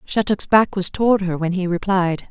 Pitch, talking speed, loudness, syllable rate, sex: 190 Hz, 210 wpm, -19 LUFS, 5.1 syllables/s, female